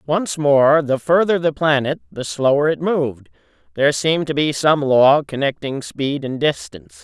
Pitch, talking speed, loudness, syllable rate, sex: 145 Hz, 170 wpm, -17 LUFS, 4.7 syllables/s, male